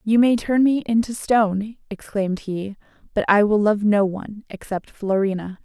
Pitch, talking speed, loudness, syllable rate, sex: 210 Hz, 170 wpm, -20 LUFS, 4.9 syllables/s, female